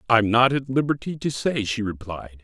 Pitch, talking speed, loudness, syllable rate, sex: 115 Hz, 195 wpm, -23 LUFS, 5.0 syllables/s, male